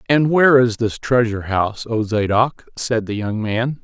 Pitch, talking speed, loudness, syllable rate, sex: 115 Hz, 190 wpm, -18 LUFS, 4.8 syllables/s, male